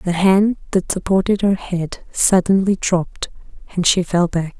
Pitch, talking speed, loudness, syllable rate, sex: 185 Hz, 155 wpm, -17 LUFS, 4.4 syllables/s, female